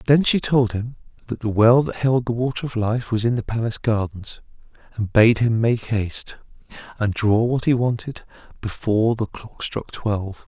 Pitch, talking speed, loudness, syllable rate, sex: 115 Hz, 190 wpm, -21 LUFS, 4.9 syllables/s, male